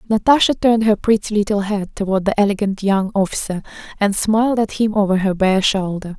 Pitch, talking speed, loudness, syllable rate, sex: 205 Hz, 185 wpm, -17 LUFS, 5.7 syllables/s, female